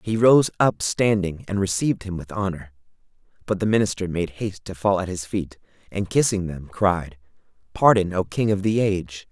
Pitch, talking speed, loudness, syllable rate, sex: 95 Hz, 185 wpm, -22 LUFS, 5.2 syllables/s, male